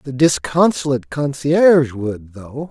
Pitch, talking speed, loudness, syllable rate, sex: 140 Hz, 110 wpm, -16 LUFS, 4.1 syllables/s, male